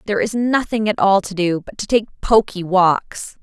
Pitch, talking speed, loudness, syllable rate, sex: 200 Hz, 210 wpm, -18 LUFS, 4.6 syllables/s, female